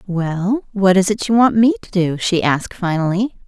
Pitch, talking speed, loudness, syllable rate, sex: 195 Hz, 205 wpm, -17 LUFS, 4.9 syllables/s, female